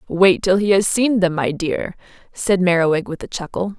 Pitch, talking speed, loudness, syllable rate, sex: 185 Hz, 205 wpm, -18 LUFS, 4.9 syllables/s, female